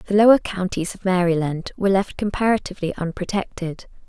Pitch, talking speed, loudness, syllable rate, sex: 190 Hz, 130 wpm, -21 LUFS, 5.8 syllables/s, female